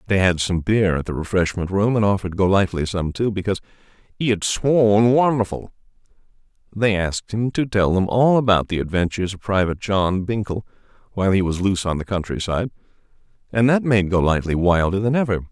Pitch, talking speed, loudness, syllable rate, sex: 100 Hz, 180 wpm, -20 LUFS, 6.0 syllables/s, male